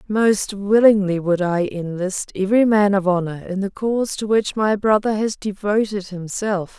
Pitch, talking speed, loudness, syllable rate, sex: 200 Hz, 170 wpm, -19 LUFS, 4.6 syllables/s, female